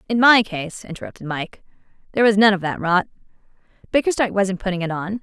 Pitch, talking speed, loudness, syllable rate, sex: 195 Hz, 185 wpm, -19 LUFS, 6.6 syllables/s, female